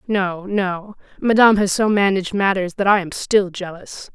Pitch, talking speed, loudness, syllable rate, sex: 195 Hz, 175 wpm, -18 LUFS, 4.8 syllables/s, female